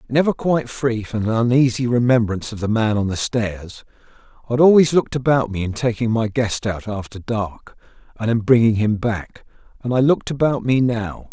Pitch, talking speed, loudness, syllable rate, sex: 115 Hz, 195 wpm, -19 LUFS, 5.3 syllables/s, male